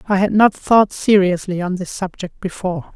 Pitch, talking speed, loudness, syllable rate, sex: 190 Hz, 185 wpm, -17 LUFS, 5.2 syllables/s, female